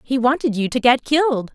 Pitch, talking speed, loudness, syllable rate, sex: 250 Hz, 235 wpm, -18 LUFS, 5.5 syllables/s, female